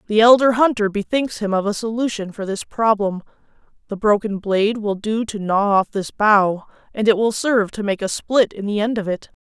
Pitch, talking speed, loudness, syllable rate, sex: 210 Hz, 215 wpm, -19 LUFS, 5.2 syllables/s, female